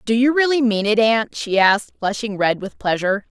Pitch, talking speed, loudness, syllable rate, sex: 220 Hz, 210 wpm, -18 LUFS, 5.5 syllables/s, female